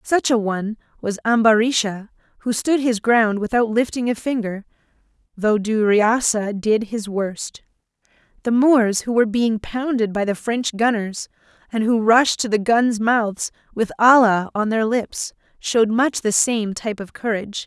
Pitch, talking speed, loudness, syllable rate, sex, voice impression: 225 Hz, 160 wpm, -19 LUFS, 4.4 syllables/s, female, feminine, adult-like, sincere, friendly